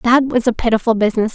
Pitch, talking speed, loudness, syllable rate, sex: 230 Hz, 225 wpm, -16 LUFS, 6.9 syllables/s, female